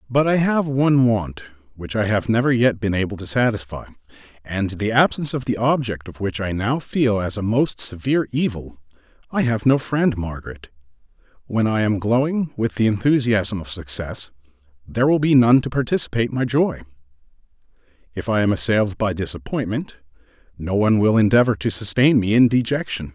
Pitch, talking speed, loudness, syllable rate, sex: 110 Hz, 175 wpm, -20 LUFS, 5.5 syllables/s, male